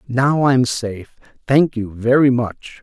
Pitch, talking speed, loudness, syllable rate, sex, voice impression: 125 Hz, 150 wpm, -17 LUFS, 3.8 syllables/s, male, masculine, middle-aged, slightly relaxed, slightly weak, slightly muffled, raspy, calm, mature, slightly friendly, wild, slightly lively, slightly kind